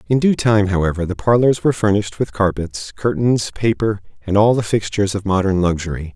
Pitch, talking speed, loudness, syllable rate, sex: 100 Hz, 185 wpm, -18 LUFS, 5.8 syllables/s, male